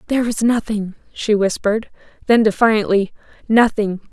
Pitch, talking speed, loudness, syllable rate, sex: 215 Hz, 85 wpm, -17 LUFS, 5.1 syllables/s, female